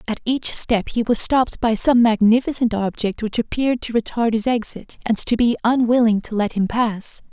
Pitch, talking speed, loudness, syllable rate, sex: 230 Hz, 195 wpm, -19 LUFS, 5.1 syllables/s, female